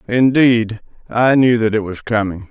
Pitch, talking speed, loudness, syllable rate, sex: 115 Hz, 170 wpm, -15 LUFS, 4.3 syllables/s, male